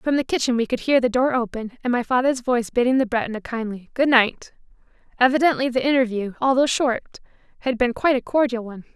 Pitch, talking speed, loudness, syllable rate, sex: 245 Hz, 210 wpm, -21 LUFS, 6.3 syllables/s, female